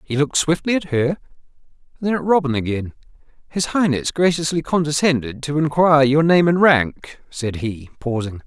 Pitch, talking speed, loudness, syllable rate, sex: 145 Hz, 155 wpm, -19 LUFS, 5.1 syllables/s, male